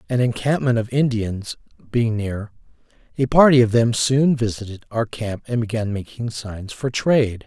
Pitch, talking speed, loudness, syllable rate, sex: 115 Hz, 160 wpm, -20 LUFS, 4.7 syllables/s, male